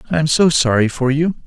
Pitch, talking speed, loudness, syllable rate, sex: 145 Hz, 245 wpm, -15 LUFS, 5.9 syllables/s, male